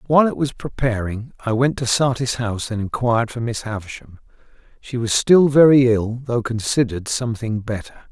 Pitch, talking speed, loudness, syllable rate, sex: 120 Hz, 170 wpm, -19 LUFS, 5.5 syllables/s, male